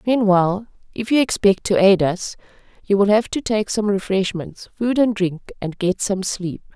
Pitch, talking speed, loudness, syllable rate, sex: 200 Hz, 185 wpm, -19 LUFS, 4.6 syllables/s, female